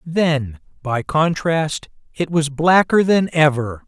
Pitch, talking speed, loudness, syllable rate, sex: 155 Hz, 125 wpm, -18 LUFS, 3.3 syllables/s, male